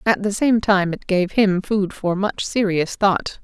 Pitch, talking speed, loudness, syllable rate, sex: 195 Hz, 210 wpm, -19 LUFS, 3.9 syllables/s, female